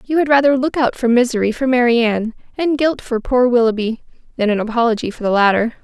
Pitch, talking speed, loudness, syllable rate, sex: 240 Hz, 205 wpm, -16 LUFS, 6.0 syllables/s, female